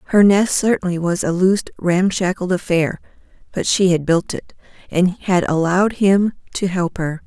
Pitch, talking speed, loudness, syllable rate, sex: 185 Hz, 165 wpm, -17 LUFS, 4.9 syllables/s, female